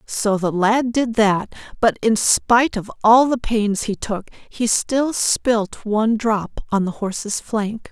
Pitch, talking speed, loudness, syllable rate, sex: 220 Hz, 175 wpm, -19 LUFS, 3.6 syllables/s, female